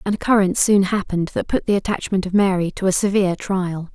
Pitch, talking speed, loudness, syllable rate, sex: 190 Hz, 215 wpm, -19 LUFS, 6.3 syllables/s, female